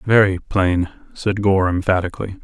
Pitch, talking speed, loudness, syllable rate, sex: 95 Hz, 125 wpm, -19 LUFS, 4.7 syllables/s, male